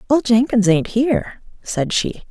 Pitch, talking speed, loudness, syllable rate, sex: 230 Hz, 155 wpm, -17 LUFS, 4.4 syllables/s, female